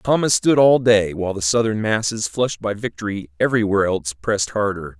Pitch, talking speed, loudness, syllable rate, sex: 105 Hz, 180 wpm, -19 LUFS, 6.1 syllables/s, male